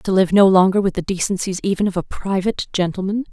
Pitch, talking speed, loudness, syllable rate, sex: 190 Hz, 215 wpm, -18 LUFS, 6.3 syllables/s, female